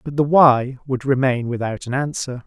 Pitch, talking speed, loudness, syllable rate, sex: 130 Hz, 195 wpm, -19 LUFS, 4.8 syllables/s, male